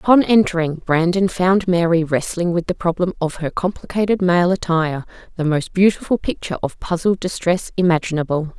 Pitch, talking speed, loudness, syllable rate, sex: 175 Hz, 155 wpm, -18 LUFS, 5.5 syllables/s, female